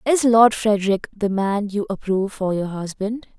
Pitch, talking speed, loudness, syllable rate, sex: 205 Hz, 175 wpm, -20 LUFS, 4.8 syllables/s, female